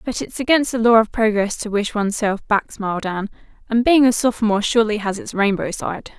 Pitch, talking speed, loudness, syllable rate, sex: 220 Hz, 225 wpm, -19 LUFS, 6.0 syllables/s, female